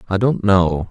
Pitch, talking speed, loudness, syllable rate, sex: 105 Hz, 200 wpm, -16 LUFS, 4.2 syllables/s, male